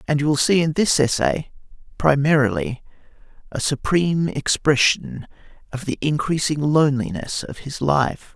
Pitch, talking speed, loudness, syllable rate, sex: 140 Hz, 130 wpm, -20 LUFS, 4.7 syllables/s, male